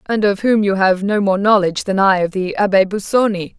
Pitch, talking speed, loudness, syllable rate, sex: 200 Hz, 235 wpm, -15 LUFS, 5.4 syllables/s, female